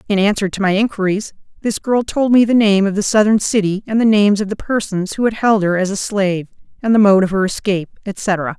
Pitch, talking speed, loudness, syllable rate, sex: 205 Hz, 245 wpm, -16 LUFS, 5.9 syllables/s, female